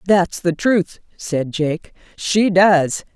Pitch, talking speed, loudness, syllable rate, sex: 180 Hz, 135 wpm, -18 LUFS, 2.8 syllables/s, female